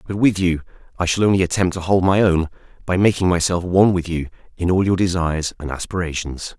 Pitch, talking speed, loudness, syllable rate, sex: 90 Hz, 210 wpm, -19 LUFS, 6.1 syllables/s, male